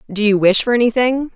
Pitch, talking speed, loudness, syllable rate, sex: 225 Hz, 220 wpm, -15 LUFS, 6.0 syllables/s, female